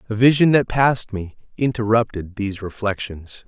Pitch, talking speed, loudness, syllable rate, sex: 110 Hz, 140 wpm, -20 LUFS, 5.2 syllables/s, male